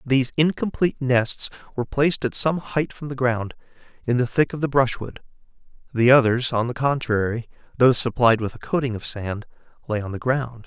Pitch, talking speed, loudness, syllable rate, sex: 125 Hz, 185 wpm, -22 LUFS, 5.5 syllables/s, male